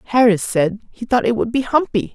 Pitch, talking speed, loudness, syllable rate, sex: 225 Hz, 225 wpm, -18 LUFS, 5.6 syllables/s, female